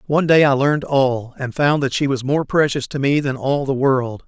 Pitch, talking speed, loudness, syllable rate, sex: 135 Hz, 255 wpm, -18 LUFS, 5.2 syllables/s, male